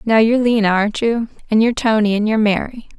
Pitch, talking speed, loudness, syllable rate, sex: 220 Hz, 200 wpm, -16 LUFS, 6.4 syllables/s, female